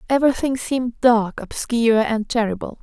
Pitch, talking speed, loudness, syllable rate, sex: 235 Hz, 125 wpm, -20 LUFS, 5.4 syllables/s, female